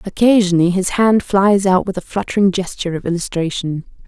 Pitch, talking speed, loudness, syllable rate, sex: 190 Hz, 160 wpm, -16 LUFS, 5.8 syllables/s, female